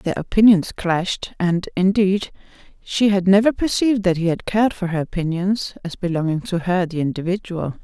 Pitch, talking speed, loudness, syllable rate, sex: 185 Hz, 170 wpm, -19 LUFS, 5.3 syllables/s, female